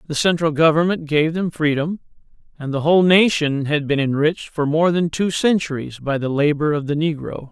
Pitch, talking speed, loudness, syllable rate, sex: 155 Hz, 190 wpm, -19 LUFS, 5.4 syllables/s, male